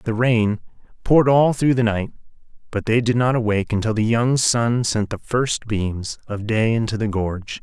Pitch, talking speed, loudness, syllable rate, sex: 115 Hz, 195 wpm, -20 LUFS, 4.8 syllables/s, male